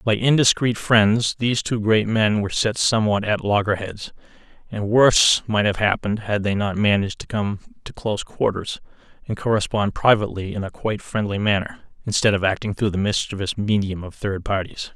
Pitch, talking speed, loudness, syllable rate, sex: 105 Hz, 175 wpm, -20 LUFS, 5.5 syllables/s, male